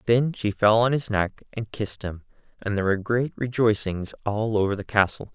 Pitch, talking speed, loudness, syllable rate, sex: 110 Hz, 200 wpm, -24 LUFS, 5.4 syllables/s, male